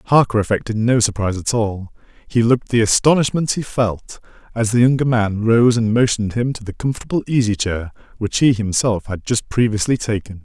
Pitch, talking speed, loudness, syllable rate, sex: 115 Hz, 180 wpm, -18 LUFS, 5.5 syllables/s, male